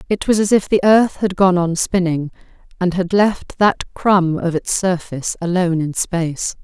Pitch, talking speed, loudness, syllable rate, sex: 180 Hz, 190 wpm, -17 LUFS, 4.7 syllables/s, female